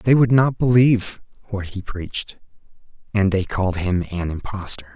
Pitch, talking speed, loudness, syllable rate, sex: 100 Hz, 155 wpm, -20 LUFS, 4.9 syllables/s, male